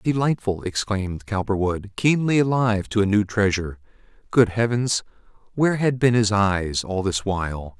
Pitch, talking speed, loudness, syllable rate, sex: 105 Hz, 145 wpm, -22 LUFS, 4.9 syllables/s, male